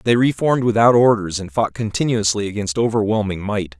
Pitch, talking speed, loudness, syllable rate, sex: 110 Hz, 160 wpm, -18 LUFS, 5.7 syllables/s, male